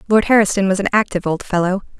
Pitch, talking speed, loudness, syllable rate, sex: 195 Hz, 210 wpm, -16 LUFS, 7.4 syllables/s, female